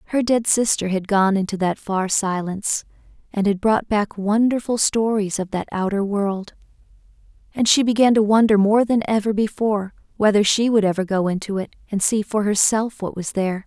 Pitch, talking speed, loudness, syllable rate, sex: 205 Hz, 185 wpm, -20 LUFS, 5.2 syllables/s, female